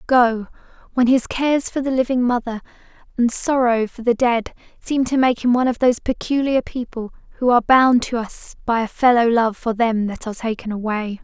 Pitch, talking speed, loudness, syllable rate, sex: 240 Hz, 200 wpm, -19 LUFS, 5.5 syllables/s, female